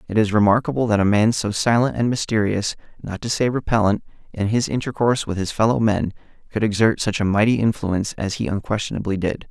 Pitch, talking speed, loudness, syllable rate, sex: 110 Hz, 195 wpm, -20 LUFS, 6.1 syllables/s, male